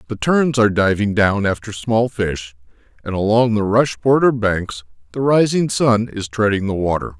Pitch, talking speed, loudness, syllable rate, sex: 110 Hz, 175 wpm, -17 LUFS, 4.9 syllables/s, male